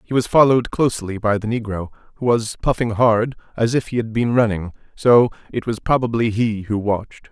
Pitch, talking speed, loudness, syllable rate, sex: 115 Hz, 190 wpm, -19 LUFS, 5.5 syllables/s, male